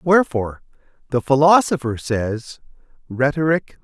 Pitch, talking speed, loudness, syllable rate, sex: 140 Hz, 80 wpm, -19 LUFS, 4.8 syllables/s, male